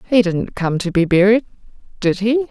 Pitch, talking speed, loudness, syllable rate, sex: 205 Hz, 170 wpm, -17 LUFS, 5.1 syllables/s, female